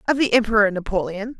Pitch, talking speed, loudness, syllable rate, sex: 215 Hz, 170 wpm, -19 LUFS, 6.7 syllables/s, female